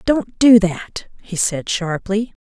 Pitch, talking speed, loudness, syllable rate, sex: 205 Hz, 150 wpm, -17 LUFS, 3.3 syllables/s, female